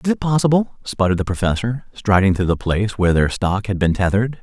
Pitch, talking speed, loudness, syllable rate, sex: 105 Hz, 215 wpm, -18 LUFS, 6.4 syllables/s, male